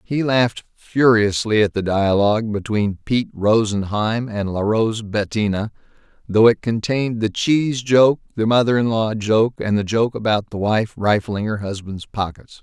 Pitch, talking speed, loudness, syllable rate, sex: 110 Hz, 155 wpm, -19 LUFS, 4.8 syllables/s, male